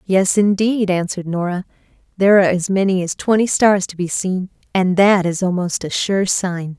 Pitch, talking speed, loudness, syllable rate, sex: 185 Hz, 185 wpm, -17 LUFS, 5.1 syllables/s, female